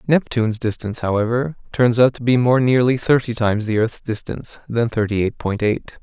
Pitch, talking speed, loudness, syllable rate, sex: 115 Hz, 190 wpm, -19 LUFS, 5.5 syllables/s, male